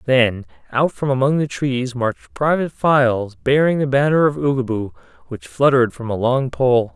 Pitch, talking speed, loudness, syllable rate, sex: 130 Hz, 175 wpm, -18 LUFS, 5.0 syllables/s, male